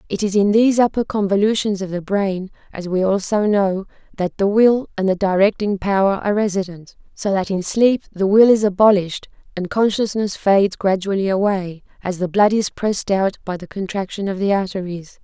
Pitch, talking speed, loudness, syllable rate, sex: 195 Hz, 185 wpm, -18 LUFS, 5.4 syllables/s, female